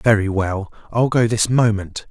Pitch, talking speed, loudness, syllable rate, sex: 110 Hz, 170 wpm, -19 LUFS, 4.3 syllables/s, male